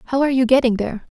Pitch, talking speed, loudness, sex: 245 Hz, 260 wpm, -18 LUFS, female